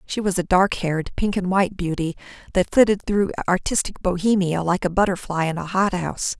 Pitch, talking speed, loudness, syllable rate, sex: 185 Hz, 190 wpm, -21 LUFS, 5.7 syllables/s, female